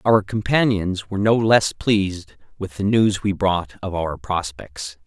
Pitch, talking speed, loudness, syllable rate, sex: 100 Hz, 165 wpm, -20 LUFS, 4.1 syllables/s, male